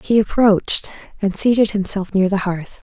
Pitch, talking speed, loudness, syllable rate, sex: 200 Hz, 165 wpm, -18 LUFS, 5.0 syllables/s, female